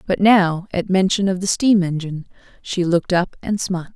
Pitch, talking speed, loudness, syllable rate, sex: 185 Hz, 195 wpm, -18 LUFS, 5.4 syllables/s, female